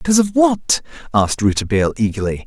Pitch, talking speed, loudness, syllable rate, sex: 140 Hz, 145 wpm, -17 LUFS, 7.2 syllables/s, male